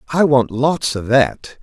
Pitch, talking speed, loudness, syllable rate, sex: 130 Hz, 185 wpm, -16 LUFS, 3.7 syllables/s, male